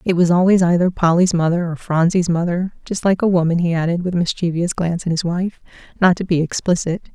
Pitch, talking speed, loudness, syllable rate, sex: 175 Hz, 220 wpm, -18 LUFS, 6.0 syllables/s, female